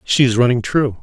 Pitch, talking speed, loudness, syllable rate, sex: 125 Hz, 235 wpm, -15 LUFS, 5.5 syllables/s, male